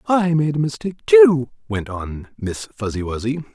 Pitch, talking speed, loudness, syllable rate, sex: 125 Hz, 170 wpm, -19 LUFS, 4.8 syllables/s, male